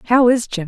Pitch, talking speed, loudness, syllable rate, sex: 230 Hz, 270 wpm, -15 LUFS, 5.8 syllables/s, female